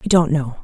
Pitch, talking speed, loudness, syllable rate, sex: 155 Hz, 285 wpm, -17 LUFS, 5.9 syllables/s, female